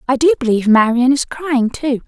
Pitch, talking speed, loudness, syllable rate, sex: 260 Hz, 200 wpm, -15 LUFS, 5.5 syllables/s, female